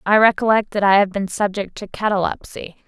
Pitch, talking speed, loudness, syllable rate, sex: 200 Hz, 190 wpm, -18 LUFS, 5.5 syllables/s, female